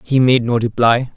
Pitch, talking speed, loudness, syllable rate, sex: 120 Hz, 205 wpm, -15 LUFS, 4.9 syllables/s, male